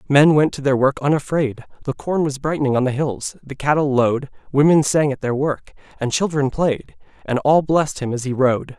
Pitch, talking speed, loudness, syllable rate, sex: 140 Hz, 210 wpm, -19 LUFS, 5.3 syllables/s, male